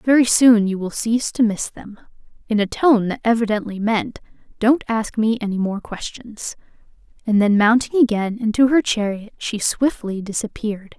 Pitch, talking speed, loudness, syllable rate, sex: 220 Hz, 165 wpm, -19 LUFS, 4.9 syllables/s, female